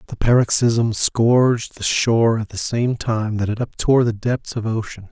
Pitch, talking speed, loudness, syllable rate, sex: 115 Hz, 190 wpm, -19 LUFS, 4.7 syllables/s, male